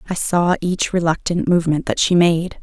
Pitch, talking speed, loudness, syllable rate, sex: 170 Hz, 185 wpm, -17 LUFS, 5.1 syllables/s, female